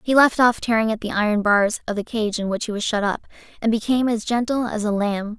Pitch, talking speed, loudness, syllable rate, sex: 220 Hz, 265 wpm, -21 LUFS, 6.0 syllables/s, female